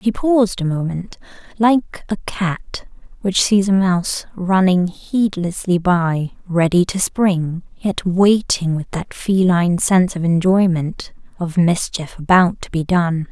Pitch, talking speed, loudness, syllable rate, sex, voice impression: 180 Hz, 140 wpm, -17 LUFS, 3.9 syllables/s, female, slightly gender-neutral, young, slightly dark, slightly calm, slightly unique, slightly kind